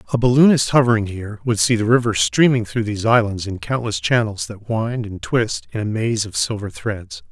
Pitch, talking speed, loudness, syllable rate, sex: 105 Hz, 205 wpm, -19 LUFS, 5.4 syllables/s, male